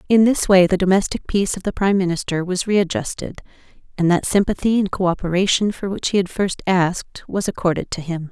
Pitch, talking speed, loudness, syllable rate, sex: 190 Hz, 195 wpm, -19 LUFS, 5.9 syllables/s, female